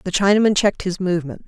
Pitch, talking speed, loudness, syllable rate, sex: 185 Hz, 205 wpm, -18 LUFS, 7.4 syllables/s, female